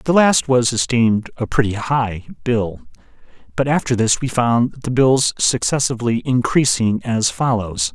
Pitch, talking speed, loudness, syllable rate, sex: 120 Hz, 145 wpm, -17 LUFS, 4.5 syllables/s, male